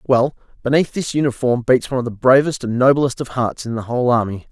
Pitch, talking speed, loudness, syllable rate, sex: 125 Hz, 215 wpm, -18 LUFS, 5.8 syllables/s, male